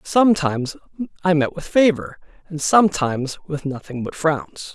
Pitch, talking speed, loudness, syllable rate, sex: 160 Hz, 140 wpm, -20 LUFS, 5.0 syllables/s, male